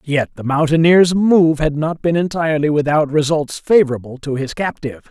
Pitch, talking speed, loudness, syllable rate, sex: 155 Hz, 165 wpm, -16 LUFS, 5.3 syllables/s, male